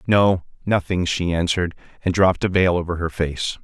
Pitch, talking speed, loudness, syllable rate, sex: 90 Hz, 180 wpm, -21 LUFS, 5.4 syllables/s, male